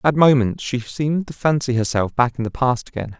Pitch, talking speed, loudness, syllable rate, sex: 130 Hz, 225 wpm, -20 LUFS, 5.5 syllables/s, male